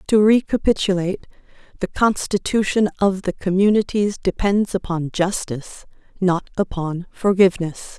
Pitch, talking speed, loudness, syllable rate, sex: 190 Hz, 100 wpm, -20 LUFS, 4.7 syllables/s, female